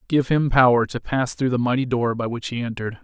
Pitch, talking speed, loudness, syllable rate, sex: 125 Hz, 255 wpm, -21 LUFS, 5.9 syllables/s, male